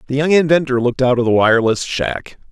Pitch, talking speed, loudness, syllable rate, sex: 135 Hz, 215 wpm, -15 LUFS, 6.3 syllables/s, male